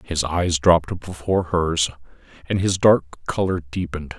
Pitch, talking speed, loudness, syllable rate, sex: 85 Hz, 145 wpm, -21 LUFS, 4.7 syllables/s, male